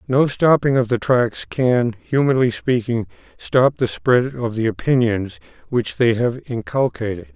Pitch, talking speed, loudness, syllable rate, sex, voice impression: 125 Hz, 145 wpm, -19 LUFS, 4.2 syllables/s, male, masculine, very adult-like, slightly dark, cool, slightly sincere, slightly calm